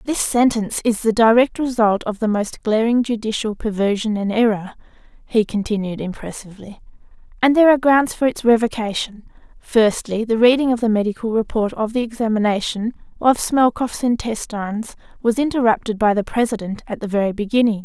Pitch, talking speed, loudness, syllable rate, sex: 225 Hz, 155 wpm, -19 LUFS, 5.6 syllables/s, female